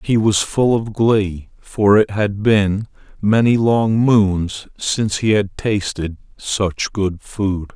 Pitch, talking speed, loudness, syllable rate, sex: 105 Hz, 145 wpm, -17 LUFS, 3.2 syllables/s, male